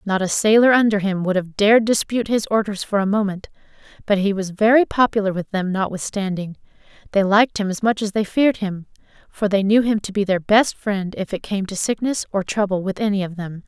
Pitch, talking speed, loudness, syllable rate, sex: 205 Hz, 225 wpm, -19 LUFS, 5.8 syllables/s, female